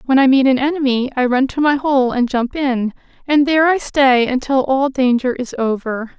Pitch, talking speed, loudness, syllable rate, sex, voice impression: 265 Hz, 215 wpm, -16 LUFS, 5.0 syllables/s, female, very feminine, young, slightly adult-like, very thin, slightly tensed, slightly powerful, very bright, soft, very clear, very fluent, very cute, intellectual, very refreshing, sincere, calm, very friendly, very reassuring, unique, very elegant, sweet, lively, very kind, slightly sharp, slightly modest, light